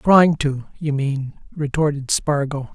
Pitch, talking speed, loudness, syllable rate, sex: 145 Hz, 130 wpm, -20 LUFS, 3.7 syllables/s, male